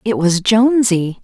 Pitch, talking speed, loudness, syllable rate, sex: 205 Hz, 145 wpm, -14 LUFS, 4.4 syllables/s, female